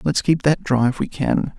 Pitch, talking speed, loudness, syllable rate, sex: 145 Hz, 265 wpm, -19 LUFS, 4.7 syllables/s, male